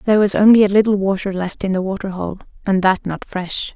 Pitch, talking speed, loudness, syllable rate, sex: 195 Hz, 240 wpm, -17 LUFS, 6.0 syllables/s, female